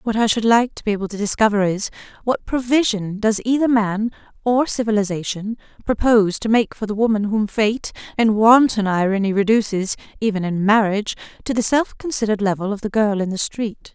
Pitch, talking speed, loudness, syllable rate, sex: 215 Hz, 180 wpm, -19 LUFS, 5.6 syllables/s, female